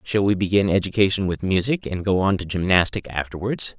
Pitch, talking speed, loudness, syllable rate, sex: 95 Hz, 190 wpm, -21 LUFS, 5.7 syllables/s, male